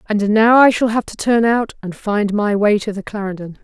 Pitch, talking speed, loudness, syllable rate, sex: 210 Hz, 250 wpm, -16 LUFS, 5.0 syllables/s, female